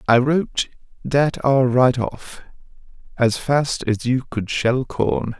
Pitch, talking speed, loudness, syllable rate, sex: 125 Hz, 145 wpm, -20 LUFS, 3.6 syllables/s, male